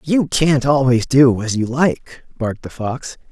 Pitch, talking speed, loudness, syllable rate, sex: 135 Hz, 180 wpm, -17 LUFS, 4.1 syllables/s, male